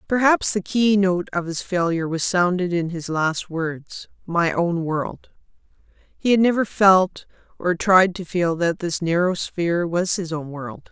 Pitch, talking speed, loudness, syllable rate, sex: 180 Hz, 170 wpm, -21 LUFS, 4.2 syllables/s, female